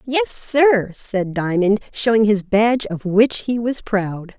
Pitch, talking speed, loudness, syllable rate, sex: 215 Hz, 165 wpm, -18 LUFS, 3.7 syllables/s, female